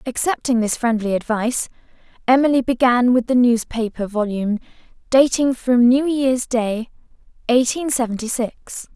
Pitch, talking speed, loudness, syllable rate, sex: 245 Hz, 120 wpm, -18 LUFS, 4.8 syllables/s, female